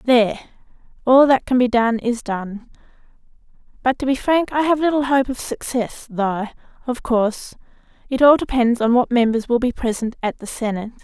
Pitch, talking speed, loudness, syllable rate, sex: 240 Hz, 180 wpm, -19 LUFS, 5.2 syllables/s, female